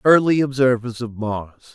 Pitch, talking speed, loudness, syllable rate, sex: 125 Hz, 140 wpm, -19 LUFS, 4.6 syllables/s, male